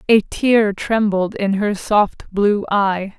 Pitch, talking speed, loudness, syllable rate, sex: 205 Hz, 150 wpm, -17 LUFS, 3.1 syllables/s, female